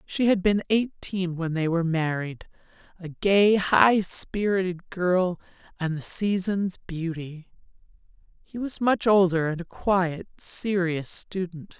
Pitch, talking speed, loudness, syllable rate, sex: 185 Hz, 125 wpm, -25 LUFS, 3.7 syllables/s, female